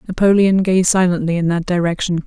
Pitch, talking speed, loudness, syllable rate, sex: 180 Hz, 160 wpm, -16 LUFS, 5.7 syllables/s, female